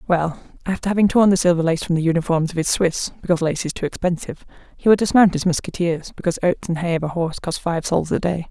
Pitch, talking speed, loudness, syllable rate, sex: 170 Hz, 245 wpm, -20 LUFS, 6.7 syllables/s, female